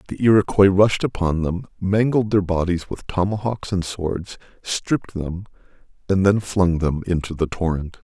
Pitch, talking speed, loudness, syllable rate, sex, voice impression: 95 Hz, 155 wpm, -21 LUFS, 4.6 syllables/s, male, very masculine, slightly old, very thick, very tensed, very powerful, dark, very soft, very muffled, fluent, raspy, very cool, intellectual, sincere, very calm, very mature, very friendly, reassuring, very unique, slightly elegant, very wild, sweet, slightly lively, very kind, modest